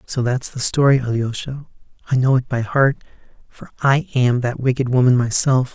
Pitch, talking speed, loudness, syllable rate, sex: 125 Hz, 180 wpm, -18 LUFS, 5.1 syllables/s, male